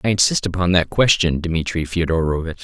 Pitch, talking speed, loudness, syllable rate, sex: 90 Hz, 160 wpm, -18 LUFS, 5.6 syllables/s, male